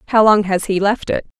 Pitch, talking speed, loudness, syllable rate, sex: 205 Hz, 255 wpm, -16 LUFS, 5.7 syllables/s, female